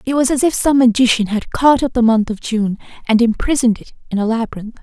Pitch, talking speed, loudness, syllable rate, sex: 235 Hz, 235 wpm, -15 LUFS, 6.2 syllables/s, female